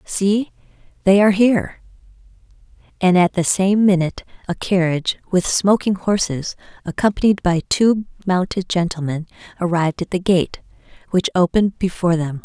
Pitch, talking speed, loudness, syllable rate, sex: 185 Hz, 130 wpm, -18 LUFS, 5.3 syllables/s, female